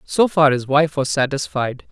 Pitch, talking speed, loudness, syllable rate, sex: 145 Hz, 190 wpm, -18 LUFS, 4.4 syllables/s, male